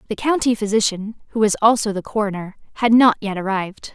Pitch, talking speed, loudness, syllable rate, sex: 210 Hz, 185 wpm, -18 LUFS, 6.0 syllables/s, female